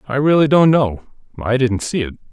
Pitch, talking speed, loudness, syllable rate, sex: 130 Hz, 205 wpm, -16 LUFS, 5.5 syllables/s, male